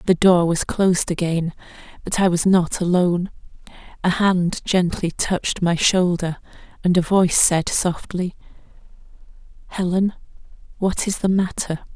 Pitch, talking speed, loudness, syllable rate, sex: 180 Hz, 120 wpm, -20 LUFS, 4.6 syllables/s, female